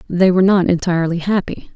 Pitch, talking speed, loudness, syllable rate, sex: 180 Hz, 170 wpm, -15 LUFS, 6.4 syllables/s, female